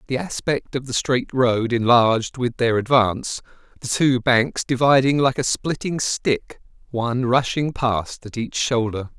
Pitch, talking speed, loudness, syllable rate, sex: 125 Hz, 155 wpm, -20 LUFS, 4.3 syllables/s, male